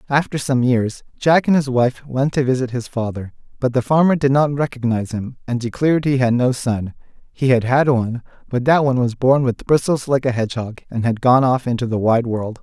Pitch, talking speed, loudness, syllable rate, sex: 130 Hz, 225 wpm, -18 LUFS, 5.5 syllables/s, male